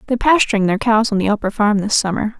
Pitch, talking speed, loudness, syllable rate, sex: 215 Hz, 250 wpm, -16 LUFS, 6.8 syllables/s, female